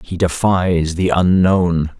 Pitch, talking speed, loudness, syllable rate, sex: 90 Hz, 120 wpm, -15 LUFS, 3.2 syllables/s, male